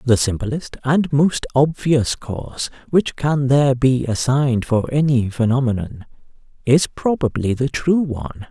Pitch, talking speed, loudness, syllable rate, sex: 130 Hz, 135 wpm, -19 LUFS, 4.3 syllables/s, male